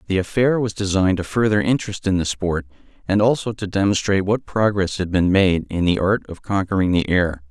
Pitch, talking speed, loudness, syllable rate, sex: 95 Hz, 210 wpm, -20 LUFS, 5.7 syllables/s, male